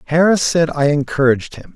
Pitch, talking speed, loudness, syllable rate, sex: 150 Hz, 170 wpm, -15 LUFS, 6.0 syllables/s, male